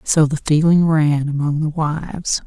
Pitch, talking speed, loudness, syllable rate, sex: 155 Hz, 170 wpm, -17 LUFS, 4.3 syllables/s, female